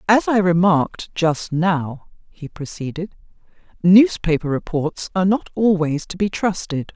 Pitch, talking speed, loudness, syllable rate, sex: 180 Hz, 130 wpm, -19 LUFS, 4.3 syllables/s, female